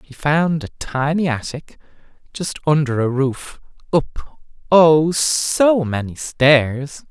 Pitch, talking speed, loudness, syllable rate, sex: 145 Hz, 120 wpm, -17 LUFS, 3.2 syllables/s, male